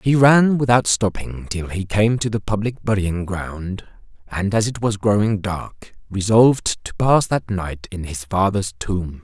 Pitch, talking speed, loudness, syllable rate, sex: 105 Hz, 175 wpm, -19 LUFS, 4.1 syllables/s, male